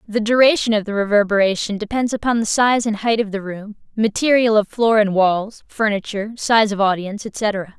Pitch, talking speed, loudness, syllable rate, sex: 215 Hz, 185 wpm, -18 LUFS, 5.3 syllables/s, female